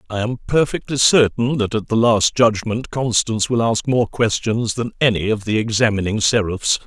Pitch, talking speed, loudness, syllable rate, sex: 115 Hz, 175 wpm, -18 LUFS, 5.0 syllables/s, male